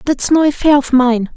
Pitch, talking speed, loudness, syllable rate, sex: 270 Hz, 220 wpm, -12 LUFS, 5.0 syllables/s, female